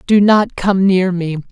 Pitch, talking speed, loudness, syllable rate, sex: 190 Hz, 200 wpm, -14 LUFS, 4.0 syllables/s, female